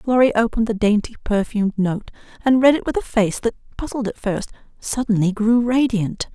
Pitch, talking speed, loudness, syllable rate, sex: 225 Hz, 180 wpm, -20 LUFS, 5.5 syllables/s, female